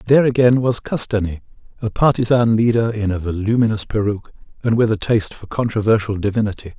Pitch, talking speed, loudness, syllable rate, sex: 110 Hz, 160 wpm, -18 LUFS, 6.2 syllables/s, male